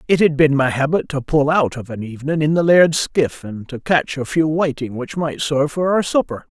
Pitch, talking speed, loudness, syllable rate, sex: 145 Hz, 250 wpm, -18 LUFS, 5.2 syllables/s, male